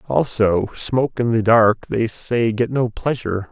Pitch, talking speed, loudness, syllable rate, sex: 115 Hz, 170 wpm, -19 LUFS, 4.3 syllables/s, male